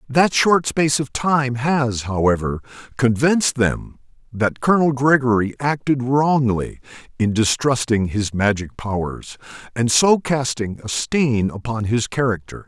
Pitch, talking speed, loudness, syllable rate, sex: 125 Hz, 130 wpm, -19 LUFS, 4.2 syllables/s, male